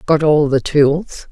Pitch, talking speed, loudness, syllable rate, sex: 150 Hz, 185 wpm, -14 LUFS, 3.4 syllables/s, female